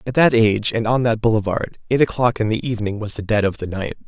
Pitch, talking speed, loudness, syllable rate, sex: 110 Hz, 265 wpm, -19 LUFS, 6.4 syllables/s, male